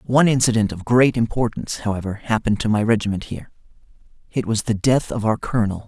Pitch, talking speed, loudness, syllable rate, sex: 110 Hz, 185 wpm, -20 LUFS, 6.7 syllables/s, male